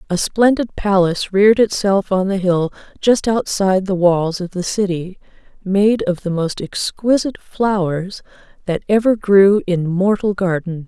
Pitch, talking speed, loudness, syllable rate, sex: 195 Hz, 150 wpm, -17 LUFS, 4.5 syllables/s, female